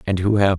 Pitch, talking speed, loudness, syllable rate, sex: 95 Hz, 305 wpm, -18 LUFS, 6.0 syllables/s, male